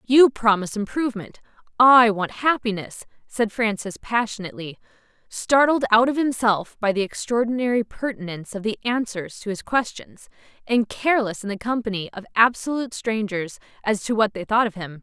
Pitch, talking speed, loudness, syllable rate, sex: 220 Hz, 150 wpm, -22 LUFS, 5.3 syllables/s, female